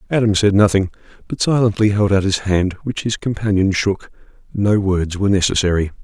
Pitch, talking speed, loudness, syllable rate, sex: 100 Hz, 170 wpm, -17 LUFS, 5.6 syllables/s, male